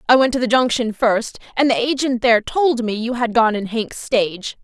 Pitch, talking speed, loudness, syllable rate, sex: 235 Hz, 235 wpm, -18 LUFS, 5.2 syllables/s, female